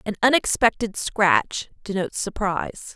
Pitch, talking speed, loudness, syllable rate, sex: 205 Hz, 100 wpm, -22 LUFS, 4.6 syllables/s, female